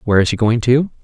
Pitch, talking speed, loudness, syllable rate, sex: 120 Hz, 290 wpm, -15 LUFS, 7.2 syllables/s, male